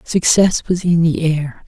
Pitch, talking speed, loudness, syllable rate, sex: 165 Hz, 180 wpm, -15 LUFS, 3.8 syllables/s, male